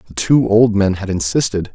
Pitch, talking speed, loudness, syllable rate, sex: 105 Hz, 205 wpm, -15 LUFS, 5.2 syllables/s, male